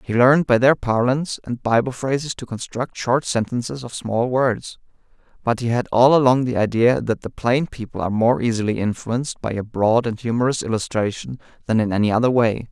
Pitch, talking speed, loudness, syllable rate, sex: 120 Hz, 195 wpm, -20 LUFS, 5.5 syllables/s, male